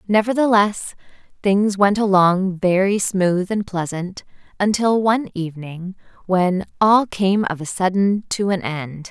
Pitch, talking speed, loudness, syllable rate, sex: 195 Hz, 130 wpm, -19 LUFS, 4.0 syllables/s, female